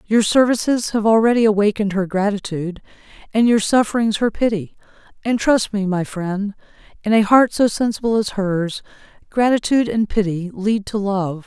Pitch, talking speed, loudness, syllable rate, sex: 210 Hz, 155 wpm, -18 LUFS, 5.2 syllables/s, female